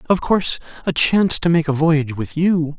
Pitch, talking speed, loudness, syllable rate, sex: 160 Hz, 215 wpm, -18 LUFS, 5.6 syllables/s, male